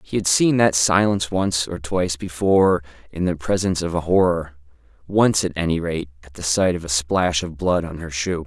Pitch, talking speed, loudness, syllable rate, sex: 85 Hz, 205 wpm, -20 LUFS, 5.3 syllables/s, male